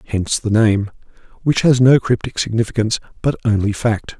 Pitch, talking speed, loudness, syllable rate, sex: 115 Hz, 155 wpm, -17 LUFS, 5.6 syllables/s, male